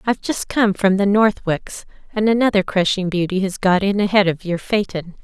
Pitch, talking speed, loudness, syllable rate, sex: 195 Hz, 195 wpm, -18 LUFS, 5.2 syllables/s, female